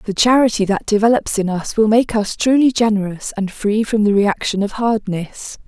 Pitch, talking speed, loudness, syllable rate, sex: 215 Hz, 190 wpm, -16 LUFS, 4.9 syllables/s, female